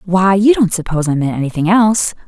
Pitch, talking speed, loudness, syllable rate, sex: 185 Hz, 210 wpm, -14 LUFS, 6.3 syllables/s, female